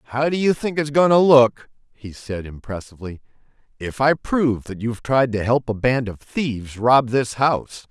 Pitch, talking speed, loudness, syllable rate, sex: 125 Hz, 205 wpm, -19 LUFS, 5.1 syllables/s, male